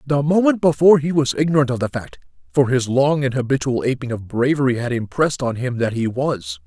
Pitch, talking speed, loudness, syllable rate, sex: 130 Hz, 215 wpm, -19 LUFS, 5.8 syllables/s, male